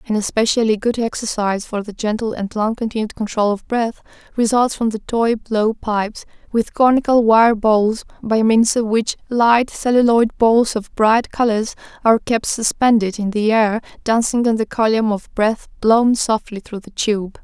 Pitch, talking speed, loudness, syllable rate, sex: 220 Hz, 170 wpm, -17 LUFS, 4.6 syllables/s, female